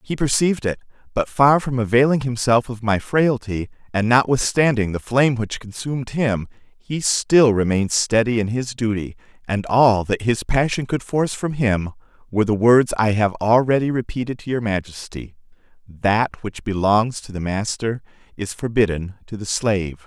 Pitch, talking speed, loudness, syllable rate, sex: 115 Hz, 165 wpm, -20 LUFS, 4.9 syllables/s, male